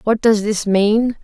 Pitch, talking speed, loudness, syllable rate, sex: 215 Hz, 195 wpm, -16 LUFS, 3.6 syllables/s, female